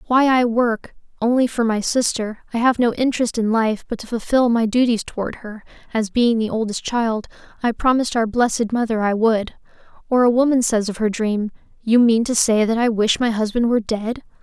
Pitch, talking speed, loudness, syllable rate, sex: 230 Hz, 210 wpm, -19 LUFS, 5.3 syllables/s, female